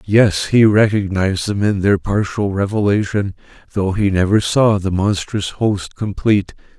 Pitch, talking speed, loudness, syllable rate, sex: 100 Hz, 140 wpm, -16 LUFS, 4.5 syllables/s, male